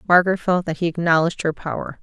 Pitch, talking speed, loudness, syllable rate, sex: 170 Hz, 205 wpm, -20 LUFS, 7.1 syllables/s, female